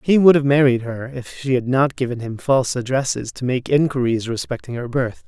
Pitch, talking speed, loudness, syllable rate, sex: 130 Hz, 215 wpm, -19 LUFS, 5.5 syllables/s, male